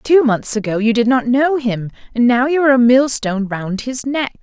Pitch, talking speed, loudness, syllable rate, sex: 245 Hz, 230 wpm, -15 LUFS, 5.1 syllables/s, female